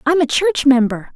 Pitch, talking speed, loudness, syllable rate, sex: 290 Hz, 210 wpm, -15 LUFS, 5.0 syllables/s, female